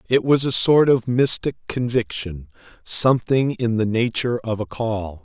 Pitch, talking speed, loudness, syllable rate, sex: 120 Hz, 150 wpm, -19 LUFS, 4.5 syllables/s, male